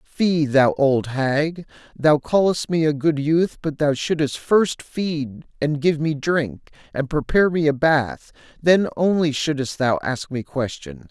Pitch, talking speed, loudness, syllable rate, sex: 150 Hz, 165 wpm, -20 LUFS, 3.6 syllables/s, male